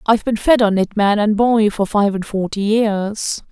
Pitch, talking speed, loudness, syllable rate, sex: 210 Hz, 220 wpm, -16 LUFS, 4.5 syllables/s, female